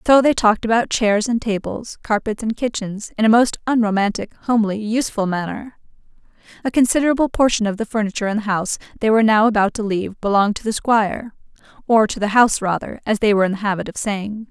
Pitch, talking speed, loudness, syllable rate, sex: 215 Hz, 200 wpm, -18 LUFS, 6.5 syllables/s, female